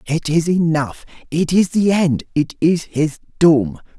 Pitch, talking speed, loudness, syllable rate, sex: 160 Hz, 135 wpm, -17 LUFS, 4.0 syllables/s, male